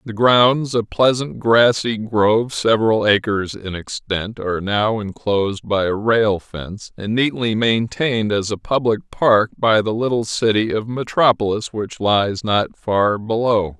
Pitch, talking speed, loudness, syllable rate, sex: 110 Hz, 150 wpm, -18 LUFS, 4.2 syllables/s, male